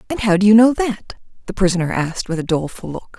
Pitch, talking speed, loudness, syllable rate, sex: 195 Hz, 245 wpm, -17 LUFS, 6.8 syllables/s, female